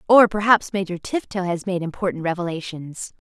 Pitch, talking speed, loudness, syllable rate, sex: 185 Hz, 150 wpm, -21 LUFS, 5.4 syllables/s, female